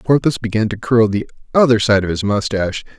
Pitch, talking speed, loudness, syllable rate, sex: 110 Hz, 200 wpm, -16 LUFS, 5.8 syllables/s, male